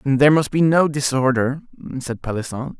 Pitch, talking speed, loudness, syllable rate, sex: 135 Hz, 150 wpm, -19 LUFS, 5.2 syllables/s, male